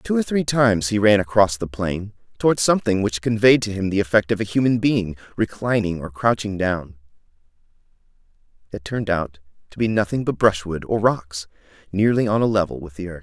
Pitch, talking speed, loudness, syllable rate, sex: 100 Hz, 190 wpm, -20 LUFS, 5.6 syllables/s, male